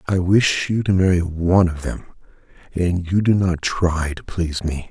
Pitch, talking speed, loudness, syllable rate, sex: 90 Hz, 195 wpm, -19 LUFS, 4.6 syllables/s, male